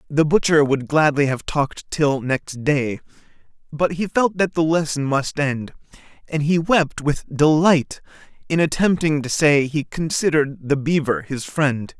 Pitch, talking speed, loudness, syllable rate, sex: 150 Hz, 160 wpm, -19 LUFS, 4.3 syllables/s, male